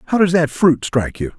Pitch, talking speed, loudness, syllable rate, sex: 145 Hz, 260 wpm, -16 LUFS, 6.3 syllables/s, male